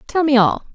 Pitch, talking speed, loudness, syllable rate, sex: 265 Hz, 240 wpm, -16 LUFS, 5.6 syllables/s, female